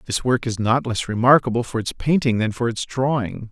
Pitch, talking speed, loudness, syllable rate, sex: 120 Hz, 220 wpm, -20 LUFS, 5.4 syllables/s, male